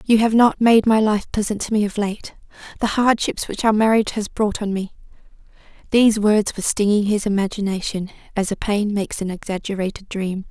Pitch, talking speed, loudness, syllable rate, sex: 210 Hz, 175 wpm, -19 LUFS, 5.6 syllables/s, female